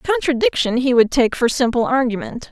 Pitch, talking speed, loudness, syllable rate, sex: 260 Hz, 165 wpm, -17 LUFS, 5.5 syllables/s, female